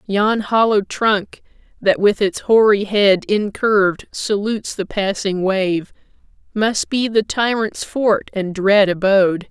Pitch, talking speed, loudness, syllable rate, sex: 205 Hz, 135 wpm, -17 LUFS, 3.6 syllables/s, female